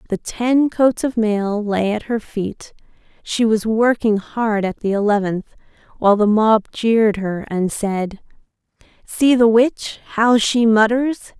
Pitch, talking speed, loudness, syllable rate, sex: 220 Hz, 155 wpm, -17 LUFS, 3.9 syllables/s, female